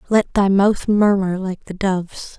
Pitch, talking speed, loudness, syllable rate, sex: 195 Hz, 175 wpm, -18 LUFS, 4.1 syllables/s, female